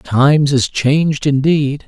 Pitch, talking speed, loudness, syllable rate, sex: 140 Hz, 130 wpm, -14 LUFS, 3.9 syllables/s, male